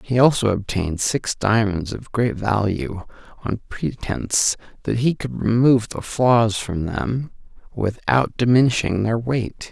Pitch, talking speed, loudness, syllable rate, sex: 110 Hz, 135 wpm, -20 LUFS, 4.1 syllables/s, male